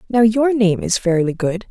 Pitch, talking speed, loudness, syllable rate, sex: 210 Hz, 210 wpm, -17 LUFS, 4.6 syllables/s, female